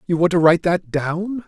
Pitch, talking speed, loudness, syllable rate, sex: 175 Hz, 245 wpm, -18 LUFS, 5.3 syllables/s, male